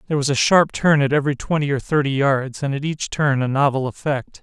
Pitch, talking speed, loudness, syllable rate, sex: 140 Hz, 245 wpm, -19 LUFS, 5.9 syllables/s, male